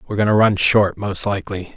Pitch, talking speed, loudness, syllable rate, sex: 100 Hz, 275 wpm, -17 LUFS, 6.9 syllables/s, male